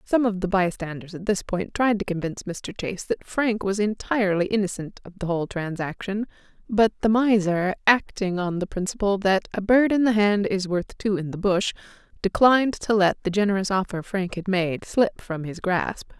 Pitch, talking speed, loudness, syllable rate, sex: 195 Hz, 195 wpm, -23 LUFS, 5.1 syllables/s, female